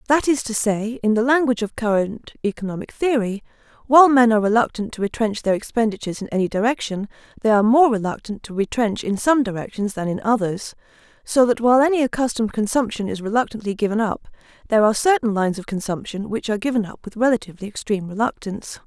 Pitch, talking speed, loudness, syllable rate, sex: 220 Hz, 185 wpm, -20 LUFS, 6.7 syllables/s, female